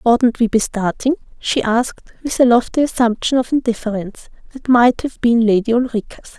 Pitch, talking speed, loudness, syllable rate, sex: 235 Hz, 170 wpm, -16 LUFS, 5.5 syllables/s, female